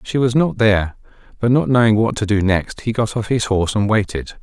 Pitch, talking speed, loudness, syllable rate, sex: 110 Hz, 245 wpm, -17 LUFS, 5.6 syllables/s, male